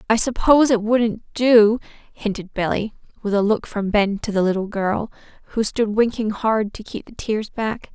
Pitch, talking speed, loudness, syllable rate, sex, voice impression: 215 Hz, 190 wpm, -20 LUFS, 4.7 syllables/s, female, very feminine, adult-like, slightly clear, slightly refreshing, sincere